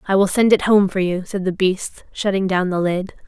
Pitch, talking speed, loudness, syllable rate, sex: 190 Hz, 255 wpm, -18 LUFS, 5.1 syllables/s, female